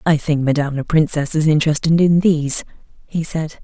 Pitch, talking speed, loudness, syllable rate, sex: 155 Hz, 180 wpm, -17 LUFS, 6.2 syllables/s, female